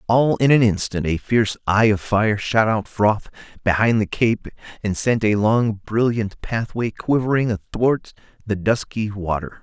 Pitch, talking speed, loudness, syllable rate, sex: 110 Hz, 160 wpm, -20 LUFS, 4.4 syllables/s, male